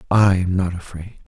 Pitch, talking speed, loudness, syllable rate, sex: 95 Hz, 175 wpm, -19 LUFS, 4.9 syllables/s, male